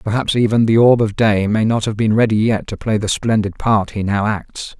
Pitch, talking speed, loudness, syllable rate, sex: 110 Hz, 250 wpm, -16 LUFS, 5.1 syllables/s, male